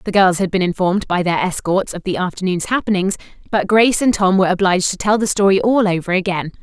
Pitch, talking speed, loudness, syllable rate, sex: 190 Hz, 225 wpm, -16 LUFS, 6.4 syllables/s, female